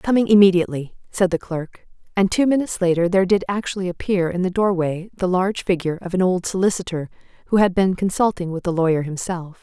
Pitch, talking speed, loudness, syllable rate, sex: 185 Hz, 195 wpm, -20 LUFS, 6.3 syllables/s, female